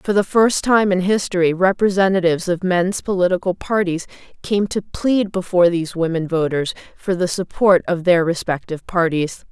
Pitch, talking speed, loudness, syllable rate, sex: 180 Hz, 160 wpm, -18 LUFS, 5.3 syllables/s, female